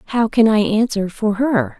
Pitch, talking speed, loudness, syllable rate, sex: 210 Hz, 200 wpm, -17 LUFS, 4.6 syllables/s, female